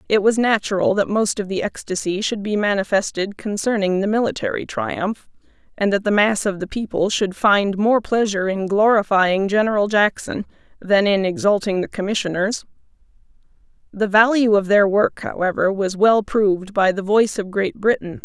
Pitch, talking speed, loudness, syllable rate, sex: 205 Hz, 165 wpm, -19 LUFS, 5.1 syllables/s, female